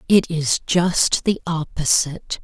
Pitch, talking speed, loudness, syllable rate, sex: 165 Hz, 125 wpm, -19 LUFS, 3.8 syllables/s, female